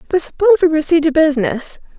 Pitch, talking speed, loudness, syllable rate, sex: 315 Hz, 180 wpm, -14 LUFS, 7.3 syllables/s, female